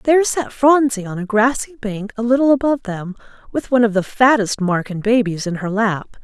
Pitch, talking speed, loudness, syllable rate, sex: 225 Hz, 200 wpm, -17 LUFS, 5.4 syllables/s, female